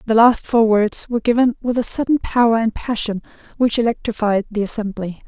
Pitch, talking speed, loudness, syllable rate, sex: 225 Hz, 180 wpm, -18 LUFS, 5.6 syllables/s, female